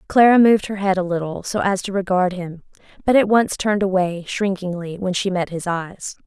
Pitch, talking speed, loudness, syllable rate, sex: 190 Hz, 210 wpm, -19 LUFS, 5.4 syllables/s, female